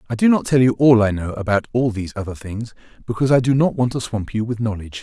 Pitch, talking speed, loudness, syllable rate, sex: 115 Hz, 275 wpm, -19 LUFS, 6.7 syllables/s, male